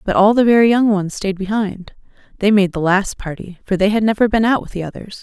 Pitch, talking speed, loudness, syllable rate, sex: 200 Hz, 255 wpm, -16 LUFS, 5.8 syllables/s, female